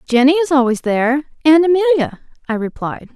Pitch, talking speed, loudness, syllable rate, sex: 280 Hz, 150 wpm, -15 LUFS, 6.0 syllables/s, female